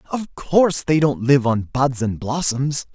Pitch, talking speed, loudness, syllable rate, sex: 140 Hz, 185 wpm, -19 LUFS, 4.0 syllables/s, male